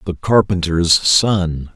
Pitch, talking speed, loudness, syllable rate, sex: 90 Hz, 105 wpm, -15 LUFS, 3.1 syllables/s, male